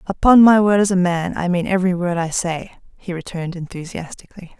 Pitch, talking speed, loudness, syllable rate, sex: 180 Hz, 195 wpm, -17 LUFS, 5.9 syllables/s, female